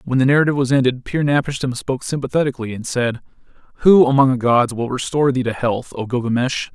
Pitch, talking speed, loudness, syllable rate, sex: 130 Hz, 215 wpm, -18 LUFS, 7.0 syllables/s, male